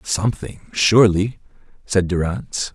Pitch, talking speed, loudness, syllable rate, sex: 100 Hz, 85 wpm, -19 LUFS, 4.8 syllables/s, male